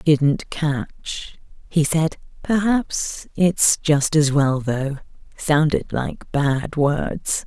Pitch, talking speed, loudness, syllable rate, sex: 150 Hz, 115 wpm, -20 LUFS, 2.5 syllables/s, female